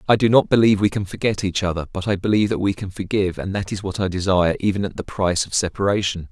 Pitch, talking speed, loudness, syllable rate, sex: 95 Hz, 265 wpm, -20 LUFS, 7.1 syllables/s, male